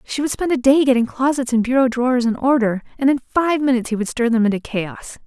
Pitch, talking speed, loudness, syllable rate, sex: 250 Hz, 250 wpm, -18 LUFS, 6.0 syllables/s, female